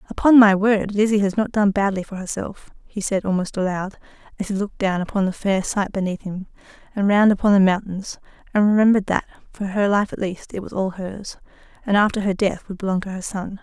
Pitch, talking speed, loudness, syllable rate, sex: 200 Hz, 220 wpm, -20 LUFS, 5.8 syllables/s, female